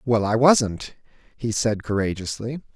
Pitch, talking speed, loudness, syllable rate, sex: 115 Hz, 130 wpm, -22 LUFS, 4.2 syllables/s, male